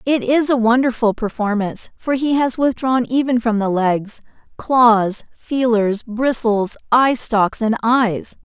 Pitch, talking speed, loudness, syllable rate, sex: 235 Hz, 140 wpm, -17 LUFS, 3.8 syllables/s, female